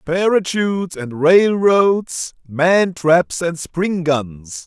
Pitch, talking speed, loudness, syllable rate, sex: 170 Hz, 105 wpm, -16 LUFS, 2.7 syllables/s, male